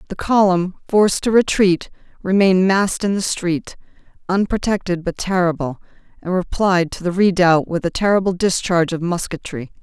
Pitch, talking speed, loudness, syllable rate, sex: 185 Hz, 145 wpm, -18 LUFS, 5.3 syllables/s, female